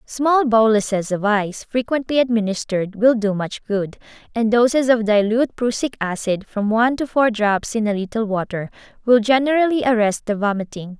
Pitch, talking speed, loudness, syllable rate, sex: 225 Hz, 165 wpm, -19 LUFS, 5.3 syllables/s, female